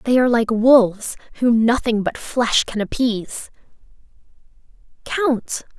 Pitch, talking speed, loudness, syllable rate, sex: 235 Hz, 115 wpm, -18 LUFS, 4.3 syllables/s, female